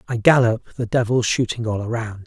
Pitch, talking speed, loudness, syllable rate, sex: 115 Hz, 185 wpm, -20 LUFS, 5.6 syllables/s, male